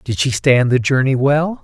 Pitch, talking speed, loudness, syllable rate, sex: 135 Hz, 220 wpm, -15 LUFS, 4.6 syllables/s, male